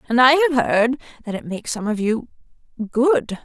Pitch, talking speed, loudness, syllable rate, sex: 230 Hz, 175 wpm, -19 LUFS, 5.1 syllables/s, female